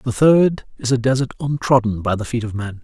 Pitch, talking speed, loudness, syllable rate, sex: 125 Hz, 235 wpm, -18 LUFS, 5.3 syllables/s, male